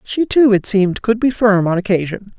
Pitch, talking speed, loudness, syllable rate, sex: 210 Hz, 225 wpm, -15 LUFS, 5.3 syllables/s, female